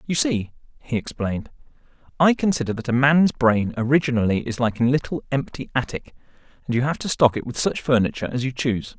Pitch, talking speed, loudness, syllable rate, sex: 130 Hz, 195 wpm, -22 LUFS, 6.2 syllables/s, male